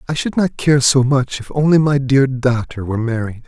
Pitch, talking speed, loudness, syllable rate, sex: 135 Hz, 225 wpm, -16 LUFS, 5.2 syllables/s, male